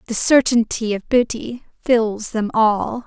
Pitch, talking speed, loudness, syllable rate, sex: 225 Hz, 135 wpm, -18 LUFS, 3.7 syllables/s, female